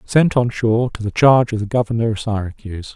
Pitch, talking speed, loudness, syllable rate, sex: 115 Hz, 225 wpm, -17 LUFS, 6.3 syllables/s, male